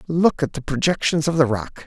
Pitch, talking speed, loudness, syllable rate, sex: 145 Hz, 225 wpm, -20 LUFS, 5.3 syllables/s, male